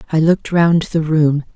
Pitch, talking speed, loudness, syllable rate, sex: 160 Hz, 195 wpm, -15 LUFS, 4.9 syllables/s, female